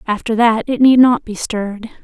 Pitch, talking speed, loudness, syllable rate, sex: 230 Hz, 205 wpm, -14 LUFS, 5.1 syllables/s, female